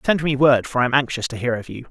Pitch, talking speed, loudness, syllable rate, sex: 130 Hz, 345 wpm, -19 LUFS, 6.8 syllables/s, male